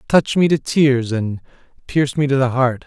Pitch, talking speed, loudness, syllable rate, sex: 135 Hz, 210 wpm, -17 LUFS, 5.3 syllables/s, male